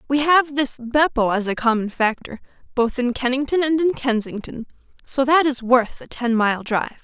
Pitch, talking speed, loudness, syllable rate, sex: 255 Hz, 190 wpm, -20 LUFS, 5.0 syllables/s, female